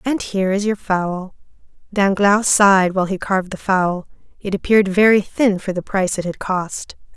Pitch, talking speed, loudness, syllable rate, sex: 195 Hz, 185 wpm, -17 LUFS, 5.2 syllables/s, female